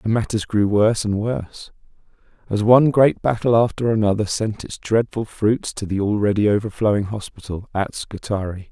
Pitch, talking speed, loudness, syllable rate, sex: 105 Hz, 160 wpm, -20 LUFS, 5.3 syllables/s, male